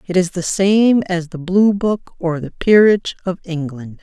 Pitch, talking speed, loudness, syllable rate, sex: 180 Hz, 195 wpm, -16 LUFS, 4.4 syllables/s, female